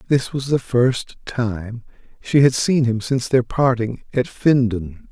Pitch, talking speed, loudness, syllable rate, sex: 120 Hz, 165 wpm, -19 LUFS, 3.8 syllables/s, male